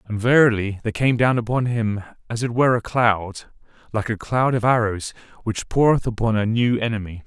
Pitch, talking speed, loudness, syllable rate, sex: 115 Hz, 190 wpm, -20 LUFS, 5.4 syllables/s, male